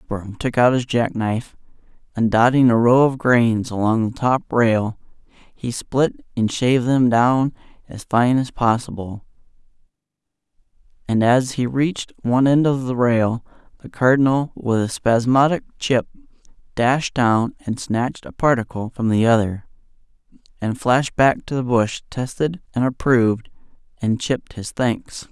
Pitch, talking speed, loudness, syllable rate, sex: 120 Hz, 145 wpm, -19 LUFS, 4.4 syllables/s, male